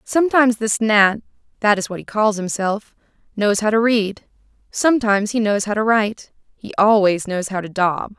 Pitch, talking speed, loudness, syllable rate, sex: 210 Hz, 170 wpm, -18 LUFS, 5.1 syllables/s, female